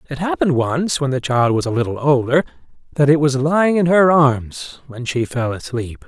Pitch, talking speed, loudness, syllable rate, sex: 140 Hz, 210 wpm, -17 LUFS, 5.2 syllables/s, male